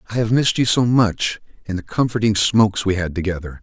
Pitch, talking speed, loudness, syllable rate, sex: 105 Hz, 200 wpm, -18 LUFS, 6.0 syllables/s, male